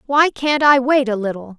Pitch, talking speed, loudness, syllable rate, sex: 260 Hz, 230 wpm, -16 LUFS, 4.8 syllables/s, female